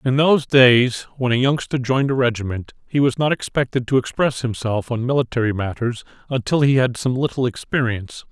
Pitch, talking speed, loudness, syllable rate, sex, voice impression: 125 Hz, 180 wpm, -19 LUFS, 5.6 syllables/s, male, very masculine, very adult-like, slightly thick, cool, sincere, slightly calm, friendly